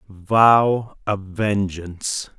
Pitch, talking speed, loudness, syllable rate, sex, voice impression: 100 Hz, 75 wpm, -19 LUFS, 2.6 syllables/s, male, masculine, very adult-like, middle-aged, very thick, slightly tensed, slightly powerful, slightly dark, hard, slightly muffled, slightly fluent, slightly cool, sincere, very calm, mature, slightly friendly, slightly unique, wild, slightly lively, kind, modest